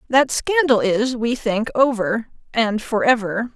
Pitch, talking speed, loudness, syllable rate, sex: 230 Hz, 135 wpm, -19 LUFS, 3.9 syllables/s, female